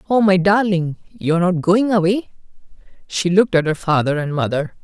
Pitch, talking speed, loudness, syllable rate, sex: 185 Hz, 175 wpm, -17 LUFS, 5.4 syllables/s, male